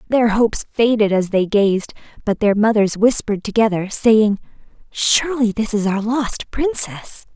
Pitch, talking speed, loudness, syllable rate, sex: 215 Hz, 145 wpm, -17 LUFS, 4.5 syllables/s, female